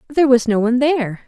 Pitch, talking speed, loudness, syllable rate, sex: 250 Hz, 235 wpm, -16 LUFS, 7.8 syllables/s, female